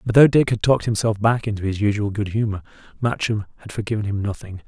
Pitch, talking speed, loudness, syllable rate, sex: 105 Hz, 220 wpm, -21 LUFS, 6.5 syllables/s, male